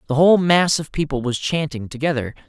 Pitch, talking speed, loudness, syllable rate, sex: 150 Hz, 195 wpm, -19 LUFS, 5.9 syllables/s, male